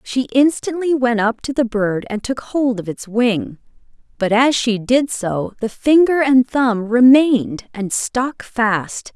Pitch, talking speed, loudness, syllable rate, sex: 240 Hz, 170 wpm, -17 LUFS, 3.7 syllables/s, female